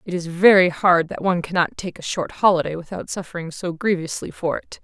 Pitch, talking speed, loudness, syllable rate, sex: 175 Hz, 210 wpm, -20 LUFS, 5.7 syllables/s, female